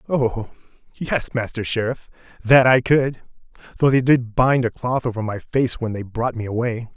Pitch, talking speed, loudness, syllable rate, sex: 120 Hz, 180 wpm, -20 LUFS, 4.6 syllables/s, male